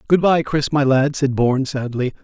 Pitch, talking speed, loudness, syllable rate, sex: 140 Hz, 215 wpm, -18 LUFS, 5.0 syllables/s, male